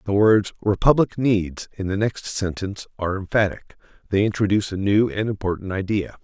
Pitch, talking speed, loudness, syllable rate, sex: 100 Hz, 165 wpm, -22 LUFS, 5.7 syllables/s, male